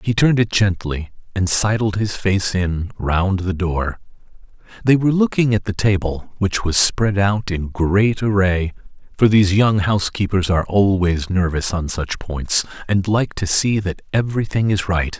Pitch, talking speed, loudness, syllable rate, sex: 95 Hz, 170 wpm, -18 LUFS, 4.2 syllables/s, male